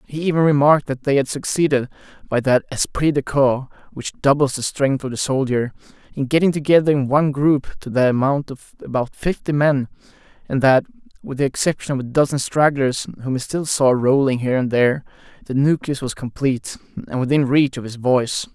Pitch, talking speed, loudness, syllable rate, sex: 135 Hz, 190 wpm, -19 LUFS, 5.6 syllables/s, male